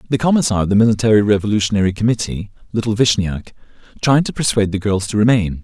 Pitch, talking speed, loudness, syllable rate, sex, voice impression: 110 Hz, 170 wpm, -16 LUFS, 7.0 syllables/s, male, masculine, adult-like, thick, powerful, slightly bright, clear, fluent, cool, intellectual, calm, friendly, reassuring, wild, lively